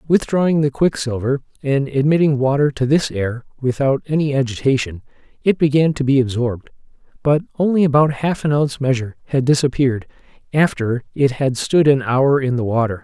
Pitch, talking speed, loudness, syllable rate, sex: 135 Hz, 160 wpm, -18 LUFS, 5.6 syllables/s, male